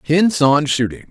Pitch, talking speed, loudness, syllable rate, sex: 150 Hz, 165 wpm, -15 LUFS, 4.1 syllables/s, male